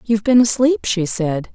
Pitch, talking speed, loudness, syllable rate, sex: 220 Hz, 195 wpm, -16 LUFS, 4.8 syllables/s, female